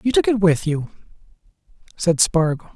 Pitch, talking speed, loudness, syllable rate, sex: 165 Hz, 150 wpm, -19 LUFS, 5.1 syllables/s, male